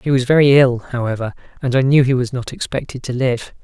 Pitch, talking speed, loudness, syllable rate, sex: 130 Hz, 230 wpm, -17 LUFS, 5.8 syllables/s, male